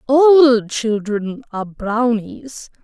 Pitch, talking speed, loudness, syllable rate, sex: 235 Hz, 85 wpm, -16 LUFS, 2.9 syllables/s, female